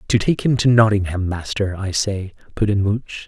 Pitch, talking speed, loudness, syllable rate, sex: 105 Hz, 200 wpm, -19 LUFS, 4.8 syllables/s, male